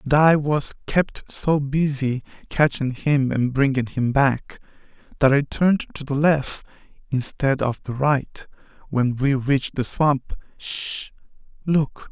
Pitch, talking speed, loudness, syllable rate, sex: 140 Hz, 135 wpm, -22 LUFS, 3.8 syllables/s, male